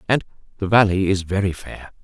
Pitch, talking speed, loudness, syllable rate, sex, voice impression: 100 Hz, 175 wpm, -20 LUFS, 5.5 syllables/s, male, masculine, middle-aged, tensed, powerful, clear, slightly fluent, slightly cool, friendly, unique, slightly wild, lively, slightly light